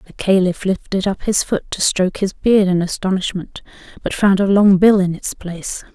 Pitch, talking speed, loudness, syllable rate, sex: 190 Hz, 200 wpm, -17 LUFS, 5.1 syllables/s, female